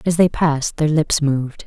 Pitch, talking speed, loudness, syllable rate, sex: 150 Hz, 215 wpm, -18 LUFS, 5.1 syllables/s, female